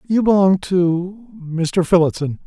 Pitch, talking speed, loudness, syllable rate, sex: 180 Hz, 95 wpm, -17 LUFS, 3.7 syllables/s, male